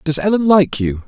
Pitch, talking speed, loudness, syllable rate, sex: 160 Hz, 225 wpm, -15 LUFS, 5.2 syllables/s, male